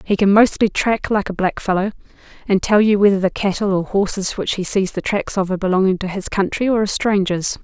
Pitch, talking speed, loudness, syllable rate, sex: 195 Hz, 230 wpm, -18 LUFS, 5.9 syllables/s, female